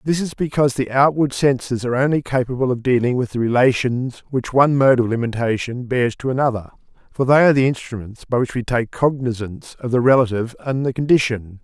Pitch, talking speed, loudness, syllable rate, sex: 125 Hz, 195 wpm, -18 LUFS, 6.1 syllables/s, male